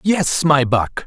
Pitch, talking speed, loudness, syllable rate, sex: 150 Hz, 170 wpm, -16 LUFS, 3.1 syllables/s, male